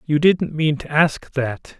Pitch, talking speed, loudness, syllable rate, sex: 150 Hz, 200 wpm, -19 LUFS, 3.7 syllables/s, male